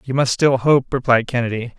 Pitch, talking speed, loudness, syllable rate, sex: 125 Hz, 200 wpm, -17 LUFS, 5.4 syllables/s, male